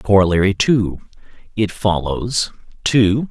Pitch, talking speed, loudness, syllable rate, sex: 100 Hz, 75 wpm, -17 LUFS, 3.7 syllables/s, male